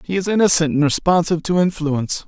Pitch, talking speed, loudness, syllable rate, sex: 165 Hz, 185 wpm, -17 LUFS, 6.5 syllables/s, male